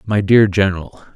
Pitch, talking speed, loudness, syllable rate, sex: 100 Hz, 155 wpm, -14 LUFS, 5.3 syllables/s, male